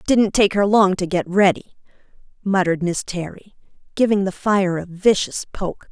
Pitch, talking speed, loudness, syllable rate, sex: 190 Hz, 160 wpm, -19 LUFS, 4.9 syllables/s, female